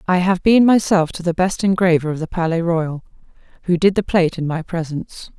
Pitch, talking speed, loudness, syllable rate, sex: 175 Hz, 210 wpm, -18 LUFS, 5.7 syllables/s, female